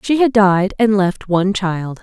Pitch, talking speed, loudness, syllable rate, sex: 200 Hz, 205 wpm, -15 LUFS, 4.3 syllables/s, female